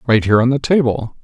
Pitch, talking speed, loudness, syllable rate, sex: 125 Hz, 245 wpm, -15 LUFS, 6.7 syllables/s, male